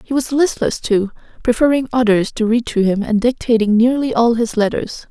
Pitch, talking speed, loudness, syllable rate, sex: 235 Hz, 190 wpm, -16 LUFS, 5.2 syllables/s, female